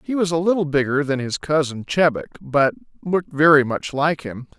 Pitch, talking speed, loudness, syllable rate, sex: 150 Hz, 195 wpm, -20 LUFS, 5.3 syllables/s, male